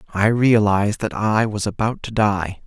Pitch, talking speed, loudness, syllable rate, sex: 105 Hz, 180 wpm, -19 LUFS, 4.6 syllables/s, male